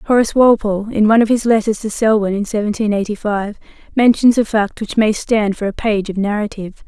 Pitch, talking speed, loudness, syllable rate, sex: 215 Hz, 210 wpm, -16 LUFS, 5.9 syllables/s, female